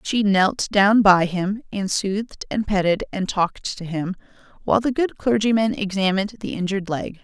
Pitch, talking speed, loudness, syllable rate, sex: 200 Hz, 175 wpm, -21 LUFS, 5.1 syllables/s, female